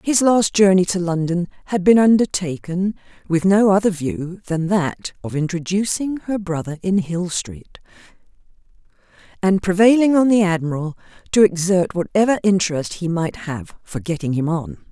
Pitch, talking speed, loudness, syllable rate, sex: 180 Hz, 150 wpm, -18 LUFS, 4.8 syllables/s, female